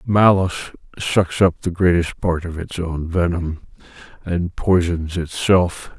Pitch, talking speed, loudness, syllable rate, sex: 85 Hz, 130 wpm, -19 LUFS, 4.0 syllables/s, male